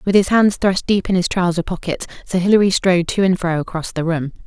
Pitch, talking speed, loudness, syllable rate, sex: 180 Hz, 240 wpm, -17 LUFS, 5.9 syllables/s, female